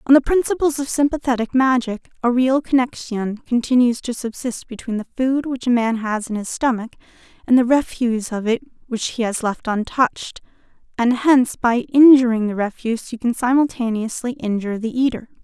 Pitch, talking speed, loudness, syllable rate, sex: 245 Hz, 170 wpm, -19 LUFS, 5.4 syllables/s, female